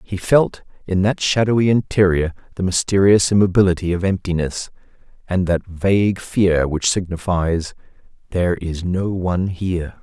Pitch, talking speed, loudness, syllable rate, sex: 90 Hz, 125 wpm, -18 LUFS, 4.8 syllables/s, male